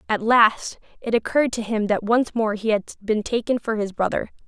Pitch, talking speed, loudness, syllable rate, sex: 220 Hz, 215 wpm, -21 LUFS, 5.3 syllables/s, female